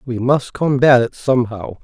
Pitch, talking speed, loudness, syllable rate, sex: 125 Hz, 165 wpm, -16 LUFS, 4.7 syllables/s, male